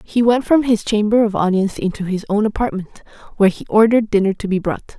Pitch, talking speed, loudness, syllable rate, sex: 210 Hz, 215 wpm, -17 LUFS, 6.3 syllables/s, female